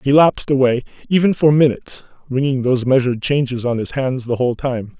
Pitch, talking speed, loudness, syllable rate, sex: 130 Hz, 190 wpm, -17 LUFS, 6.1 syllables/s, male